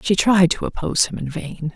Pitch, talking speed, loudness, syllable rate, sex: 165 Hz, 240 wpm, -19 LUFS, 5.5 syllables/s, female